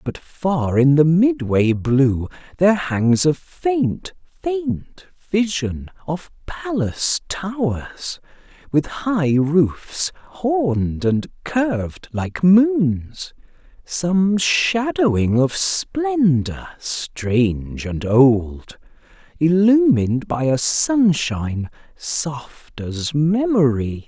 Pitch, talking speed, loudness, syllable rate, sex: 160 Hz, 90 wpm, -19 LUFS, 2.8 syllables/s, male